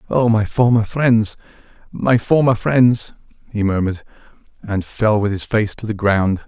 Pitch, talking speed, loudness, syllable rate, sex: 110 Hz, 160 wpm, -17 LUFS, 4.4 syllables/s, male